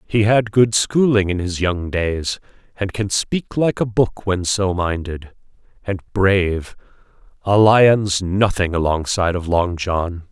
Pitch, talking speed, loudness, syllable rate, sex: 95 Hz, 145 wpm, -18 LUFS, 3.9 syllables/s, male